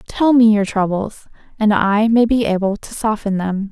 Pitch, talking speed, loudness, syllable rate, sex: 210 Hz, 195 wpm, -16 LUFS, 4.7 syllables/s, female